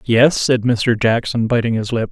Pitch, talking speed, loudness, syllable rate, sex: 115 Hz, 200 wpm, -16 LUFS, 4.5 syllables/s, male